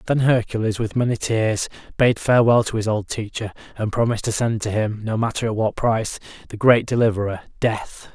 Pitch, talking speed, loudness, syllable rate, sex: 110 Hz, 190 wpm, -21 LUFS, 5.6 syllables/s, male